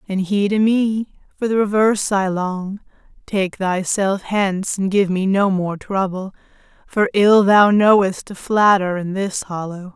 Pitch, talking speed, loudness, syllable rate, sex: 195 Hz, 165 wpm, -18 LUFS, 4.1 syllables/s, female